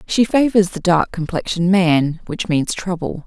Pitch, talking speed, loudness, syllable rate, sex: 180 Hz, 165 wpm, -17 LUFS, 4.6 syllables/s, female